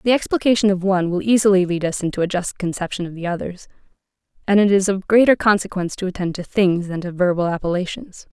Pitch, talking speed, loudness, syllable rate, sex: 190 Hz, 210 wpm, -19 LUFS, 6.5 syllables/s, female